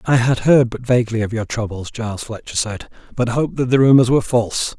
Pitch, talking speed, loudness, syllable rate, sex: 120 Hz, 225 wpm, -18 LUFS, 6.1 syllables/s, male